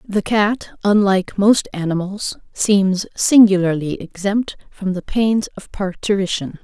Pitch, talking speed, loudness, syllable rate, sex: 200 Hz, 120 wpm, -18 LUFS, 4.0 syllables/s, female